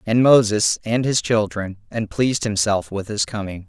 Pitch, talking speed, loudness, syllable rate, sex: 105 Hz, 180 wpm, -20 LUFS, 4.8 syllables/s, male